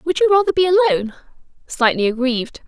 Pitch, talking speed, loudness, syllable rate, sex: 300 Hz, 155 wpm, -17 LUFS, 7.1 syllables/s, female